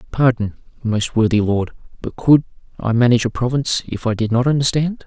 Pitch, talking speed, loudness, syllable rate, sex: 120 Hz, 165 wpm, -18 LUFS, 5.9 syllables/s, male